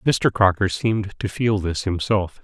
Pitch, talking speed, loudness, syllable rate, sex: 100 Hz, 170 wpm, -21 LUFS, 4.5 syllables/s, male